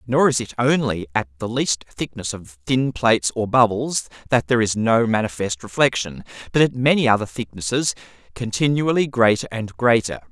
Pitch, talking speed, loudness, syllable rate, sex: 115 Hz, 165 wpm, -20 LUFS, 5.1 syllables/s, male